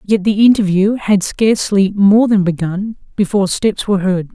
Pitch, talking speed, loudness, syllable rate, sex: 200 Hz, 165 wpm, -14 LUFS, 5.0 syllables/s, female